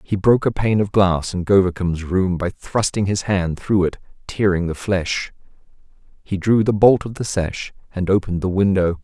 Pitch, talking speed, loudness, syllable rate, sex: 95 Hz, 195 wpm, -19 LUFS, 4.9 syllables/s, male